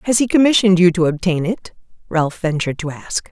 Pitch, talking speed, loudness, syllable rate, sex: 180 Hz, 200 wpm, -16 LUFS, 6.0 syllables/s, female